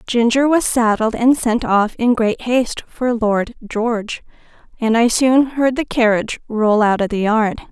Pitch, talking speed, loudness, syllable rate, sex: 230 Hz, 180 wpm, -16 LUFS, 4.3 syllables/s, female